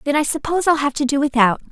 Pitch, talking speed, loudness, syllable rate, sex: 285 Hz, 280 wpm, -18 LUFS, 7.2 syllables/s, female